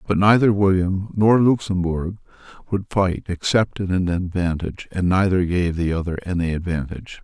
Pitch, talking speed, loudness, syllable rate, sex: 90 Hz, 150 wpm, -20 LUFS, 5.0 syllables/s, male